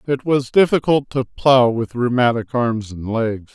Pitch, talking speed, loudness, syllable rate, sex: 125 Hz, 170 wpm, -18 LUFS, 4.3 syllables/s, male